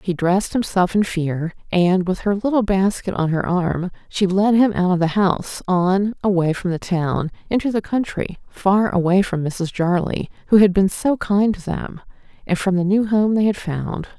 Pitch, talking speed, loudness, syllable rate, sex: 190 Hz, 205 wpm, -19 LUFS, 4.6 syllables/s, female